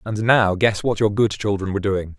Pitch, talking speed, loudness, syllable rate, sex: 100 Hz, 245 wpm, -19 LUFS, 5.3 syllables/s, male